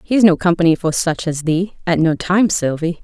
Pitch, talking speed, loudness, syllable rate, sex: 175 Hz, 220 wpm, -16 LUFS, 5.0 syllables/s, female